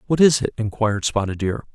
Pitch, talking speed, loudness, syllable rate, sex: 115 Hz, 205 wpm, -20 LUFS, 6.1 syllables/s, male